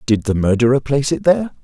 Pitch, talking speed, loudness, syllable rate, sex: 125 Hz, 220 wpm, -16 LUFS, 6.9 syllables/s, male